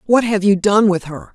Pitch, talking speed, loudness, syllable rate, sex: 200 Hz, 270 wpm, -15 LUFS, 5.0 syllables/s, female